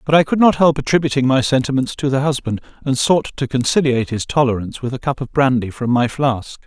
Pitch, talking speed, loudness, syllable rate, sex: 135 Hz, 225 wpm, -17 LUFS, 6.1 syllables/s, male